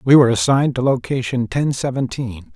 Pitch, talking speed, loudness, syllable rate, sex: 130 Hz, 165 wpm, -18 LUFS, 5.7 syllables/s, male